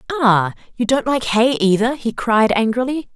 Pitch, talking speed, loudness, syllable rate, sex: 235 Hz, 170 wpm, -17 LUFS, 4.5 syllables/s, female